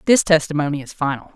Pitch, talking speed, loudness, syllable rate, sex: 155 Hz, 180 wpm, -19 LUFS, 6.7 syllables/s, female